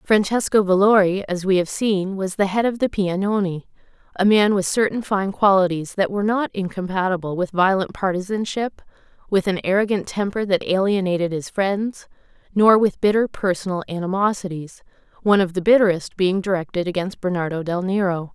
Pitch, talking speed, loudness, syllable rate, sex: 190 Hz, 155 wpm, -20 LUFS, 5.4 syllables/s, female